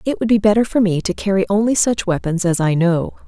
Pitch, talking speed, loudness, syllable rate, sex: 195 Hz, 255 wpm, -17 LUFS, 5.9 syllables/s, female